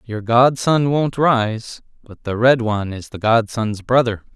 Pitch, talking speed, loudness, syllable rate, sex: 115 Hz, 165 wpm, -17 LUFS, 4.1 syllables/s, male